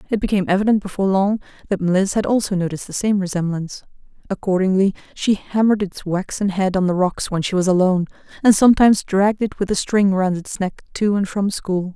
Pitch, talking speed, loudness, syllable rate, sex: 195 Hz, 200 wpm, -19 LUFS, 6.2 syllables/s, female